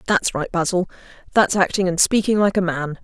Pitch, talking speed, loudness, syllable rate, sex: 185 Hz, 200 wpm, -19 LUFS, 5.7 syllables/s, female